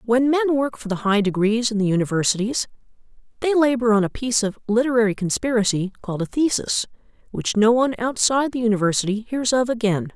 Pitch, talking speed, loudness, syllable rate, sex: 230 Hz, 175 wpm, -20 LUFS, 6.1 syllables/s, female